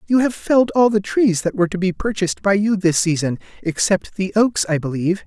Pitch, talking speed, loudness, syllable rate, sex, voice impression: 190 Hz, 230 wpm, -18 LUFS, 5.8 syllables/s, male, masculine, adult-like, relaxed, powerful, bright, raspy, cool, mature, friendly, wild, lively, intense, slightly light